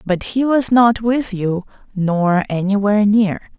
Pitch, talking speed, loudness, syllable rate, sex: 205 Hz, 150 wpm, -16 LUFS, 4.0 syllables/s, female